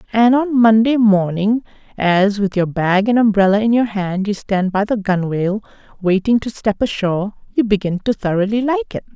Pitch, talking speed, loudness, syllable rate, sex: 210 Hz, 185 wpm, -16 LUFS, 5.1 syllables/s, female